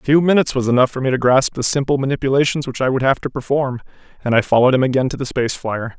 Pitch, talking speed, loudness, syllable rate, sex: 130 Hz, 270 wpm, -17 LUFS, 7.2 syllables/s, male